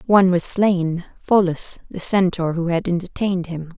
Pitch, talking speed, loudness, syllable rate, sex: 180 Hz, 160 wpm, -20 LUFS, 4.7 syllables/s, female